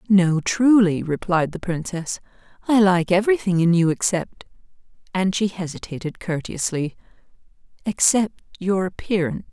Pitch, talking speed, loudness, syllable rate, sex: 185 Hz, 100 wpm, -21 LUFS, 4.8 syllables/s, female